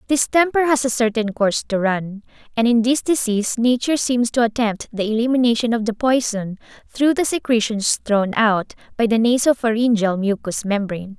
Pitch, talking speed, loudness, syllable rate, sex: 230 Hz, 165 wpm, -19 LUFS, 5.2 syllables/s, female